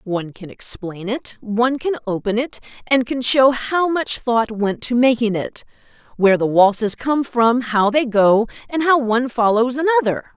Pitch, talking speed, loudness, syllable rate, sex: 235 Hz, 180 wpm, -18 LUFS, 4.7 syllables/s, female